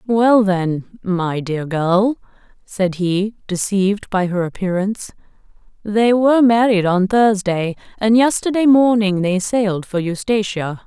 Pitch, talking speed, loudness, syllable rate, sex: 200 Hz, 125 wpm, -17 LUFS, 4.1 syllables/s, female